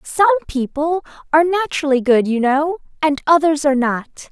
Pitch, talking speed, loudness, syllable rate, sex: 300 Hz, 155 wpm, -17 LUFS, 5.3 syllables/s, female